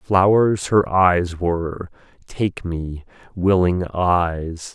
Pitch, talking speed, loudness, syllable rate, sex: 90 Hz, 100 wpm, -19 LUFS, 2.8 syllables/s, male